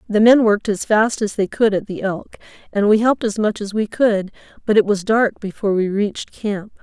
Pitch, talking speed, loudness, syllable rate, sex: 210 Hz, 235 wpm, -18 LUFS, 5.4 syllables/s, female